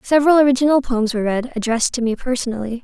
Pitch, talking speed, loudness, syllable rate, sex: 250 Hz, 190 wpm, -18 LUFS, 7.4 syllables/s, female